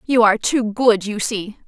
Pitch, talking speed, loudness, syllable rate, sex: 220 Hz, 215 wpm, -18 LUFS, 4.8 syllables/s, female